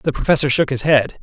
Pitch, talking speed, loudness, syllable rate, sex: 140 Hz, 245 wpm, -16 LUFS, 6.0 syllables/s, male